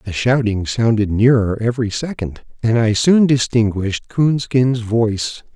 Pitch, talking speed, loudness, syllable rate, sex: 115 Hz, 130 wpm, -17 LUFS, 4.5 syllables/s, male